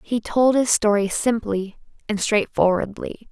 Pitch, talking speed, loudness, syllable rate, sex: 215 Hz, 125 wpm, -20 LUFS, 4.1 syllables/s, female